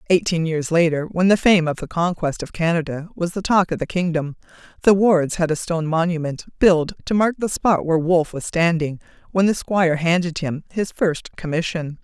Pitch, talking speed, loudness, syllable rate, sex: 170 Hz, 200 wpm, -20 LUFS, 5.5 syllables/s, female